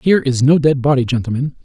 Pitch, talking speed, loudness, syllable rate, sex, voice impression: 135 Hz, 220 wpm, -15 LUFS, 6.4 syllables/s, male, very masculine, adult-like, slightly middle-aged, slightly thick, slightly relaxed, slightly weak, slightly dark, hard, slightly clear, very fluent, slightly raspy, very intellectual, slightly refreshing, very sincere, very calm, slightly mature, friendly, reassuring, very unique, elegant, slightly sweet, slightly lively, very kind, very modest